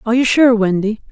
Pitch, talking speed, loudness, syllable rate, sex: 230 Hz, 215 wpm, -14 LUFS, 6.6 syllables/s, female